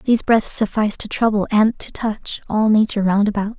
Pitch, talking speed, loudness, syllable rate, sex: 215 Hz, 200 wpm, -18 LUFS, 5.6 syllables/s, female